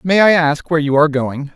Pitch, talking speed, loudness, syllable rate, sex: 155 Hz, 270 wpm, -14 LUFS, 6.2 syllables/s, male